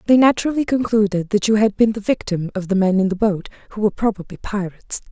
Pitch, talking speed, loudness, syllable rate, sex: 205 Hz, 225 wpm, -19 LUFS, 6.6 syllables/s, female